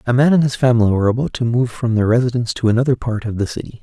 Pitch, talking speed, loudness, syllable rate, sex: 120 Hz, 280 wpm, -17 LUFS, 7.6 syllables/s, male